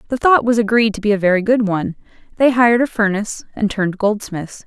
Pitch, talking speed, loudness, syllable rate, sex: 215 Hz, 220 wpm, -16 LUFS, 6.3 syllables/s, female